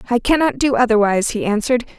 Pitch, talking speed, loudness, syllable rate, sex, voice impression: 235 Hz, 180 wpm, -17 LUFS, 7.1 syllables/s, female, very feminine, slightly young, slightly adult-like, thin, tensed, slightly powerful, bright, slightly hard, clear, very fluent, slightly raspy, cute, very intellectual, refreshing, sincere, slightly calm, friendly, reassuring, unique, elegant, slightly sweet, lively, kind, intense, slightly sharp, slightly light